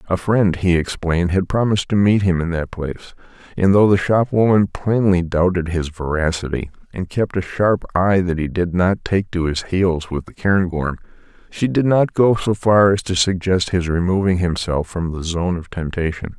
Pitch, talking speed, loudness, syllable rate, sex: 90 Hz, 195 wpm, -18 LUFS, 4.9 syllables/s, male